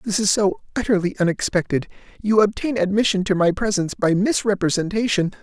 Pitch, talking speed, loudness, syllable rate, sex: 195 Hz, 135 wpm, -20 LUFS, 5.8 syllables/s, male